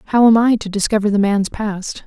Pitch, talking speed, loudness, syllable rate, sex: 210 Hz, 235 wpm, -16 LUFS, 5.5 syllables/s, female